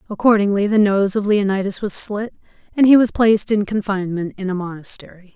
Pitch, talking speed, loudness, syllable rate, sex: 200 Hz, 180 wpm, -18 LUFS, 5.7 syllables/s, female